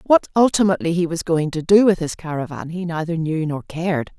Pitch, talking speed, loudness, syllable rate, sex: 170 Hz, 215 wpm, -19 LUFS, 5.8 syllables/s, female